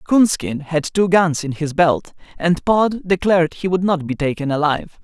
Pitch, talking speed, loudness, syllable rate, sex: 170 Hz, 190 wpm, -18 LUFS, 4.7 syllables/s, male